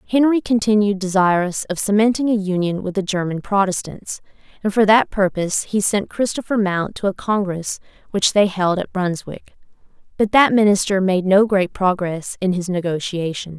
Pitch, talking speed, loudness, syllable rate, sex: 195 Hz, 165 wpm, -18 LUFS, 5.0 syllables/s, female